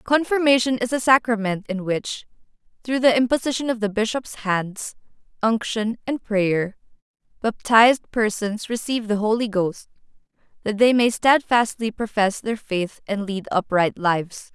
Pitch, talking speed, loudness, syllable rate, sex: 220 Hz, 135 wpm, -21 LUFS, 4.5 syllables/s, female